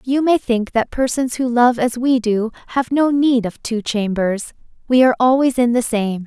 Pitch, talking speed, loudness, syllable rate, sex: 240 Hz, 210 wpm, -17 LUFS, 4.7 syllables/s, female